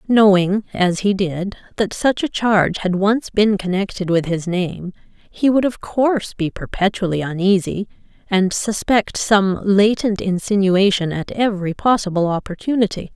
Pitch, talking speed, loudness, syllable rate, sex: 200 Hz, 140 wpm, -18 LUFS, 4.5 syllables/s, female